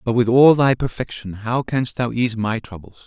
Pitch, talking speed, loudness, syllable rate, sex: 120 Hz, 215 wpm, -19 LUFS, 4.9 syllables/s, male